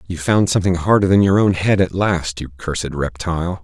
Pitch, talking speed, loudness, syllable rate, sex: 90 Hz, 215 wpm, -17 LUFS, 5.8 syllables/s, male